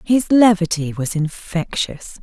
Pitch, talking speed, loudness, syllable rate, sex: 185 Hz, 110 wpm, -18 LUFS, 3.9 syllables/s, female